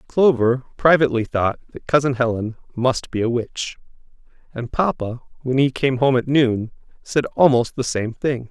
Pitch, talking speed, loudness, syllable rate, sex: 130 Hz, 160 wpm, -20 LUFS, 4.7 syllables/s, male